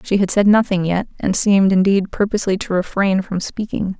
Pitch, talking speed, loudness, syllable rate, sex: 195 Hz, 195 wpm, -17 LUFS, 5.5 syllables/s, female